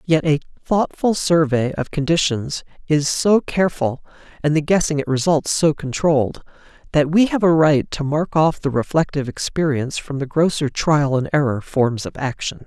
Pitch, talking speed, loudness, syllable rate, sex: 150 Hz, 170 wpm, -19 LUFS, 4.9 syllables/s, male